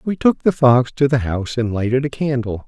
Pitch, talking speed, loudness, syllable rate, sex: 130 Hz, 245 wpm, -18 LUFS, 5.5 syllables/s, male